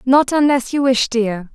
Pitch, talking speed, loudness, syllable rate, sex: 255 Hz, 195 wpm, -16 LUFS, 4.1 syllables/s, female